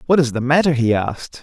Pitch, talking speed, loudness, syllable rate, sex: 140 Hz, 250 wpm, -17 LUFS, 6.3 syllables/s, male